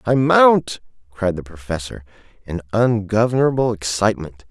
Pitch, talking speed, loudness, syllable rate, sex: 105 Hz, 105 wpm, -18 LUFS, 4.7 syllables/s, male